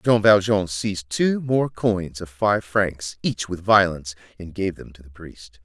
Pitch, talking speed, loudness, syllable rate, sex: 95 Hz, 190 wpm, -21 LUFS, 4.2 syllables/s, male